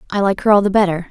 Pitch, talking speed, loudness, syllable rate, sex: 195 Hz, 325 wpm, -15 LUFS, 8.1 syllables/s, female